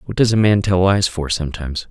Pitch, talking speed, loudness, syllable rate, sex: 95 Hz, 250 wpm, -17 LUFS, 5.9 syllables/s, male